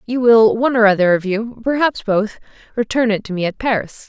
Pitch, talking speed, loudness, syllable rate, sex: 220 Hz, 220 wpm, -16 LUFS, 5.6 syllables/s, female